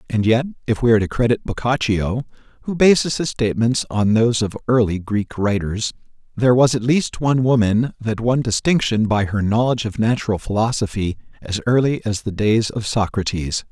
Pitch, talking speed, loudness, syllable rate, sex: 115 Hz, 175 wpm, -19 LUFS, 5.5 syllables/s, male